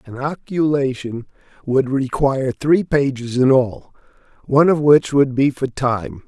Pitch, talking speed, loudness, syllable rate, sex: 135 Hz, 145 wpm, -18 LUFS, 4.3 syllables/s, male